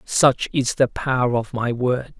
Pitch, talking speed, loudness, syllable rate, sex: 125 Hz, 190 wpm, -20 LUFS, 3.9 syllables/s, male